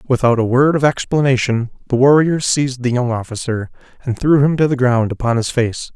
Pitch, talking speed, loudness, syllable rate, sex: 130 Hz, 200 wpm, -16 LUFS, 5.5 syllables/s, male